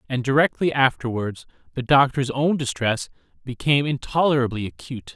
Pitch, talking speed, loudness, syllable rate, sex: 130 Hz, 115 wpm, -21 LUFS, 5.5 syllables/s, male